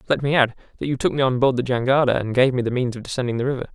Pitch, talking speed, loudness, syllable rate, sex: 125 Hz, 320 wpm, -21 LUFS, 7.7 syllables/s, male